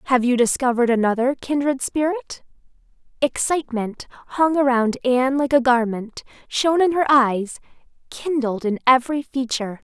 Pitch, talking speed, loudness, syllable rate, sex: 260 Hz, 125 wpm, -20 LUFS, 5.3 syllables/s, female